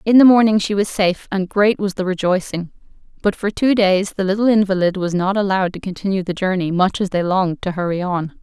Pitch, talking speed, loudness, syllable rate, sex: 190 Hz, 230 wpm, -18 LUFS, 5.9 syllables/s, female